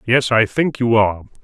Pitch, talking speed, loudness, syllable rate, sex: 115 Hz, 210 wpm, -16 LUFS, 5.4 syllables/s, male